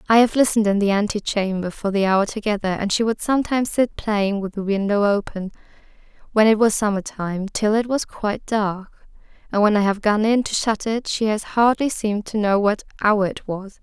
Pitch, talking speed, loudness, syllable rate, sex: 210 Hz, 215 wpm, -20 LUFS, 5.3 syllables/s, female